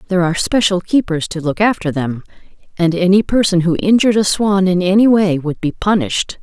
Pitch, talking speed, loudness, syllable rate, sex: 185 Hz, 195 wpm, -15 LUFS, 5.8 syllables/s, female